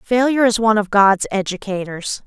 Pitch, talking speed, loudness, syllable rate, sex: 210 Hz, 160 wpm, -17 LUFS, 5.7 syllables/s, female